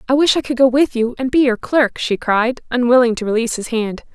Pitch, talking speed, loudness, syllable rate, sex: 245 Hz, 260 wpm, -16 LUFS, 5.8 syllables/s, female